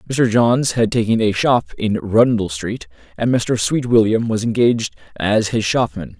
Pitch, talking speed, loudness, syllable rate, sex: 110 Hz, 165 wpm, -17 LUFS, 4.5 syllables/s, male